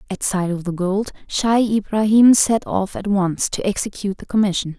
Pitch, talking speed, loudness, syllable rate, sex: 200 Hz, 190 wpm, -19 LUFS, 4.9 syllables/s, female